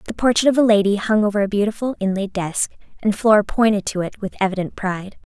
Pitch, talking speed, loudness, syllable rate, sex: 205 Hz, 210 wpm, -19 LUFS, 6.4 syllables/s, female